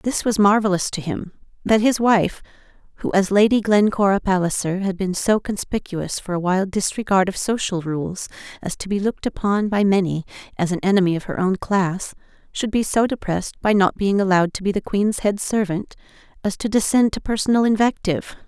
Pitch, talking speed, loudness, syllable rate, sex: 195 Hz, 185 wpm, -20 LUFS, 5.4 syllables/s, female